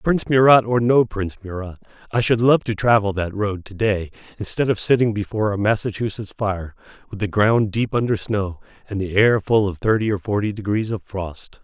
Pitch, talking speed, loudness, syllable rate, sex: 105 Hz, 200 wpm, -20 LUFS, 5.4 syllables/s, male